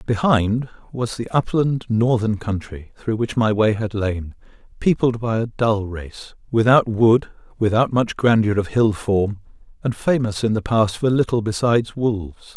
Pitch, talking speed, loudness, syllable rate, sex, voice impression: 110 Hz, 160 wpm, -20 LUFS, 4.4 syllables/s, male, masculine, very adult-like, cool, slightly intellectual, calm